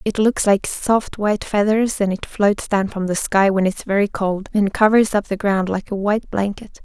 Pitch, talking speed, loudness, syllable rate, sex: 200 Hz, 230 wpm, -19 LUFS, 4.8 syllables/s, female